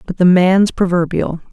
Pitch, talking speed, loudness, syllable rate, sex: 180 Hz, 160 wpm, -14 LUFS, 4.6 syllables/s, female